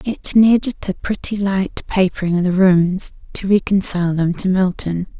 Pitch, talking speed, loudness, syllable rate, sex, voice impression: 190 Hz, 160 wpm, -17 LUFS, 4.7 syllables/s, female, very feminine, very thin, very relaxed, very weak, very dark, very soft, muffled, slightly halting, very raspy, very cute, very intellectual, slightly refreshing, sincere, very calm, very friendly, very reassuring, very unique, very elegant, slightly wild, very sweet, slightly lively, very kind, very modest, very light